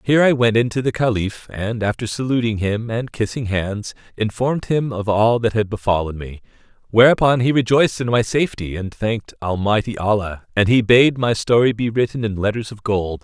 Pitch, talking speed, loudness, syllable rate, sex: 115 Hz, 195 wpm, -19 LUFS, 5.4 syllables/s, male